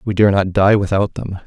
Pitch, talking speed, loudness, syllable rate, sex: 100 Hz, 245 wpm, -15 LUFS, 5.3 syllables/s, male